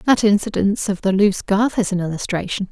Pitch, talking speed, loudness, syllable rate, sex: 200 Hz, 200 wpm, -19 LUFS, 5.8 syllables/s, female